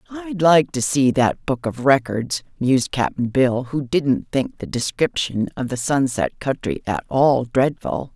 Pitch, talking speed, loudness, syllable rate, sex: 135 Hz, 170 wpm, -20 LUFS, 4.0 syllables/s, female